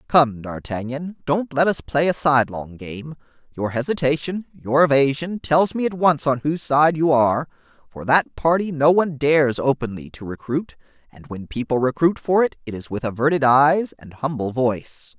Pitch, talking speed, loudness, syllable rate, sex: 140 Hz, 180 wpm, -20 LUFS, 5.0 syllables/s, male